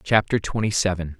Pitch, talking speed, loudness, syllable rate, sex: 95 Hz, 150 wpm, -22 LUFS, 5.5 syllables/s, male